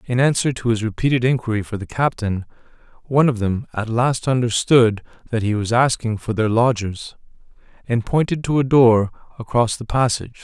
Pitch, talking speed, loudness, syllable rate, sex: 115 Hz, 170 wpm, -19 LUFS, 5.4 syllables/s, male